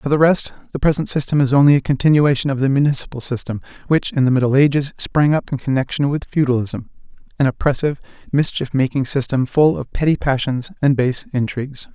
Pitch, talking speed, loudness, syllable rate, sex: 140 Hz, 180 wpm, -18 LUFS, 6.0 syllables/s, male